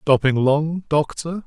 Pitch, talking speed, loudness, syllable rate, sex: 150 Hz, 125 wpm, -20 LUFS, 3.6 syllables/s, male